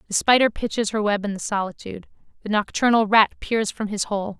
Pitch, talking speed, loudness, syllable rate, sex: 210 Hz, 205 wpm, -21 LUFS, 5.8 syllables/s, female